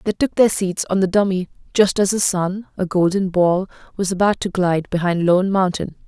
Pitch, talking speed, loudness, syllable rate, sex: 185 Hz, 205 wpm, -19 LUFS, 5.1 syllables/s, female